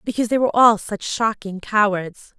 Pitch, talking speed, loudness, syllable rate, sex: 215 Hz, 175 wpm, -19 LUFS, 5.3 syllables/s, female